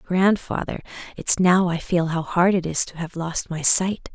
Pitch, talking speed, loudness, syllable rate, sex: 175 Hz, 205 wpm, -21 LUFS, 4.3 syllables/s, female